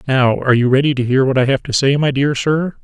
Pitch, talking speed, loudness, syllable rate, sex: 135 Hz, 295 wpm, -15 LUFS, 6.0 syllables/s, male